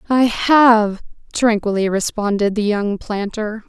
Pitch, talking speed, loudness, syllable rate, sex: 215 Hz, 115 wpm, -17 LUFS, 3.8 syllables/s, female